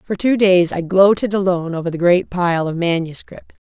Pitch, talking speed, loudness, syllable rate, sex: 180 Hz, 195 wpm, -16 LUFS, 5.2 syllables/s, female